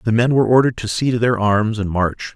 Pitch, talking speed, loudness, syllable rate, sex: 115 Hz, 280 wpm, -17 LUFS, 6.3 syllables/s, male